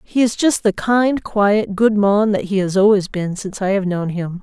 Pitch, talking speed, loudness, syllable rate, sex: 205 Hz, 245 wpm, -17 LUFS, 4.6 syllables/s, female